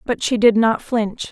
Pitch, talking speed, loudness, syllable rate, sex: 225 Hz, 230 wpm, -17 LUFS, 4.2 syllables/s, female